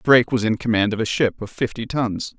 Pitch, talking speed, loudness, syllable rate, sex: 115 Hz, 250 wpm, -21 LUFS, 5.7 syllables/s, male